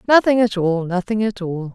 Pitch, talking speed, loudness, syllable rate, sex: 200 Hz, 170 wpm, -19 LUFS, 5.0 syllables/s, female